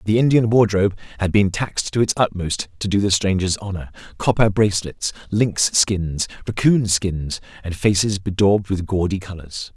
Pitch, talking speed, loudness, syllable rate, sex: 100 Hz, 155 wpm, -19 LUFS, 5.0 syllables/s, male